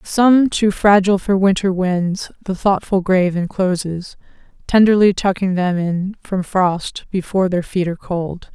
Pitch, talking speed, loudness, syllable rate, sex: 190 Hz, 150 wpm, -17 LUFS, 4.4 syllables/s, female